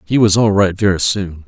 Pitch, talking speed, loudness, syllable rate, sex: 100 Hz, 245 wpm, -14 LUFS, 5.2 syllables/s, male